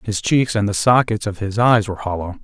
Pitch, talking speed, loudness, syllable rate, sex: 105 Hz, 245 wpm, -18 LUFS, 5.7 syllables/s, male